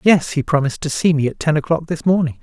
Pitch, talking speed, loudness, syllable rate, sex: 155 Hz, 270 wpm, -18 LUFS, 6.6 syllables/s, male